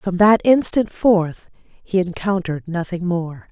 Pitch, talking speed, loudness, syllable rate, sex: 185 Hz, 135 wpm, -18 LUFS, 3.9 syllables/s, female